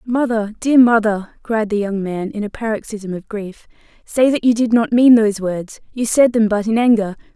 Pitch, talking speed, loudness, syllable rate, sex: 220 Hz, 210 wpm, -17 LUFS, 4.9 syllables/s, female